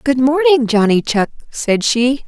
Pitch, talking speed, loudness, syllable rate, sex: 255 Hz, 160 wpm, -14 LUFS, 4.1 syllables/s, female